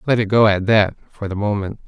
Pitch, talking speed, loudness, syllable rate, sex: 105 Hz, 255 wpm, -18 LUFS, 5.8 syllables/s, male